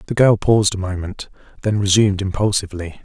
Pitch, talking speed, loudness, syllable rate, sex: 100 Hz, 160 wpm, -17 LUFS, 6.4 syllables/s, male